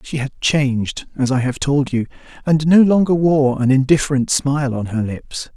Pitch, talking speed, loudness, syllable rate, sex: 140 Hz, 195 wpm, -17 LUFS, 4.9 syllables/s, male